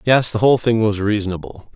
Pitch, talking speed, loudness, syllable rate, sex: 105 Hz, 205 wpm, -17 LUFS, 6.1 syllables/s, male